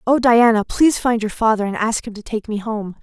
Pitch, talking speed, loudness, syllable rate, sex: 220 Hz, 260 wpm, -18 LUFS, 5.6 syllables/s, female